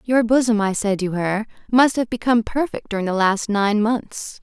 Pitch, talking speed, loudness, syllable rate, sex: 220 Hz, 205 wpm, -20 LUFS, 4.9 syllables/s, female